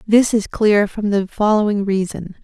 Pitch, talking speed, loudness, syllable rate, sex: 205 Hz, 175 wpm, -17 LUFS, 4.5 syllables/s, female